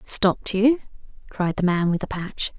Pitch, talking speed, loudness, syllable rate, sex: 195 Hz, 185 wpm, -22 LUFS, 4.6 syllables/s, female